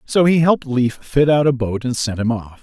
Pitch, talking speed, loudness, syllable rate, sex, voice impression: 130 Hz, 275 wpm, -17 LUFS, 5.1 syllables/s, male, very masculine, very middle-aged, very thick, very tensed, very powerful, bright, slightly soft, slightly muffled, fluent, very cool, intellectual, slightly refreshing, very sincere, very calm, very mature, friendly, reassuring, very unique, elegant, very wild, very sweet, lively, kind, slightly modest